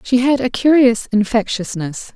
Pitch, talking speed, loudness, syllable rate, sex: 235 Hz, 140 wpm, -16 LUFS, 4.5 syllables/s, female